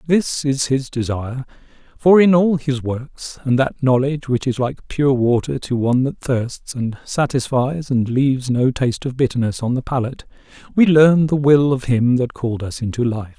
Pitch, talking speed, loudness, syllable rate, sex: 130 Hz, 195 wpm, -18 LUFS, 4.9 syllables/s, male